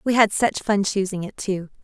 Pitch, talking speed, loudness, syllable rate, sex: 200 Hz, 230 wpm, -22 LUFS, 4.9 syllables/s, female